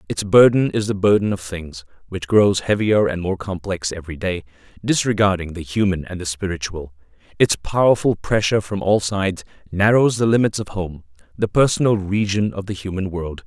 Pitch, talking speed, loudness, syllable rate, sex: 95 Hz, 175 wpm, -19 LUFS, 5.3 syllables/s, male